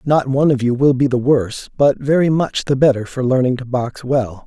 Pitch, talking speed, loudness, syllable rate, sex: 130 Hz, 240 wpm, -16 LUFS, 5.4 syllables/s, male